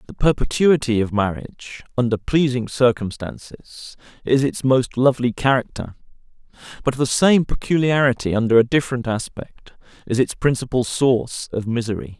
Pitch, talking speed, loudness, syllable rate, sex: 125 Hz, 130 wpm, -19 LUFS, 5.1 syllables/s, male